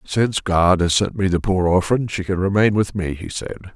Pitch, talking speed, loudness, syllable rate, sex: 95 Hz, 240 wpm, -19 LUFS, 5.2 syllables/s, male